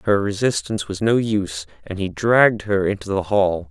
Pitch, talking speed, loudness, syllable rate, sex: 100 Hz, 195 wpm, -20 LUFS, 5.1 syllables/s, male